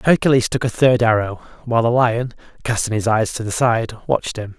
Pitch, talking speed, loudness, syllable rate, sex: 115 Hz, 210 wpm, -18 LUFS, 5.7 syllables/s, male